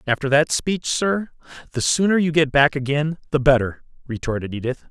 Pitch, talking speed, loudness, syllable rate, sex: 145 Hz, 170 wpm, -20 LUFS, 5.3 syllables/s, male